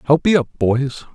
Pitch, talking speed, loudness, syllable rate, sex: 140 Hz, 210 wpm, -17 LUFS, 5.6 syllables/s, male